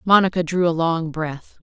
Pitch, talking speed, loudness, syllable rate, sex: 170 Hz, 180 wpm, -20 LUFS, 4.7 syllables/s, female